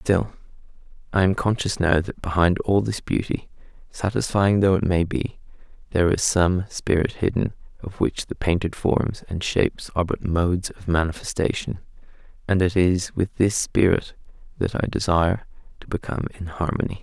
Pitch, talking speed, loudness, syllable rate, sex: 90 Hz, 160 wpm, -23 LUFS, 5.1 syllables/s, male